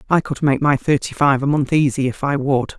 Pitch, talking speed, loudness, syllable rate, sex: 140 Hz, 260 wpm, -18 LUFS, 5.4 syllables/s, female